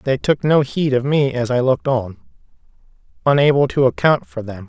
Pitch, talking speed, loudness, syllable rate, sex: 130 Hz, 190 wpm, -17 LUFS, 5.3 syllables/s, male